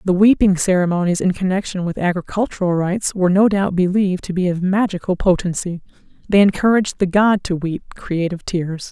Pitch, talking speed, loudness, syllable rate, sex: 185 Hz, 170 wpm, -18 LUFS, 5.8 syllables/s, female